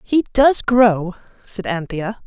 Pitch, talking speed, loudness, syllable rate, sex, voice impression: 210 Hz, 135 wpm, -17 LUFS, 3.4 syllables/s, female, very feminine, adult-like, slightly middle-aged, very thin, very tensed, powerful, very bright, hard, very clear, very fluent, slightly cute, cool, slightly intellectual, refreshing, slightly calm, very unique, slightly elegant, very lively, strict, intense